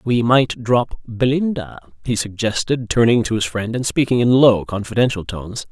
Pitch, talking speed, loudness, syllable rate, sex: 115 Hz, 170 wpm, -18 LUFS, 4.9 syllables/s, male